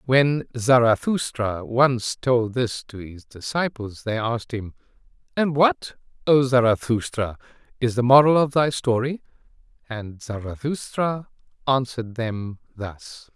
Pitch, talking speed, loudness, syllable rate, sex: 125 Hz, 115 wpm, -22 LUFS, 3.9 syllables/s, male